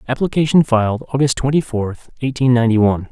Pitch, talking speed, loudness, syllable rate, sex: 125 Hz, 155 wpm, -16 LUFS, 6.4 syllables/s, male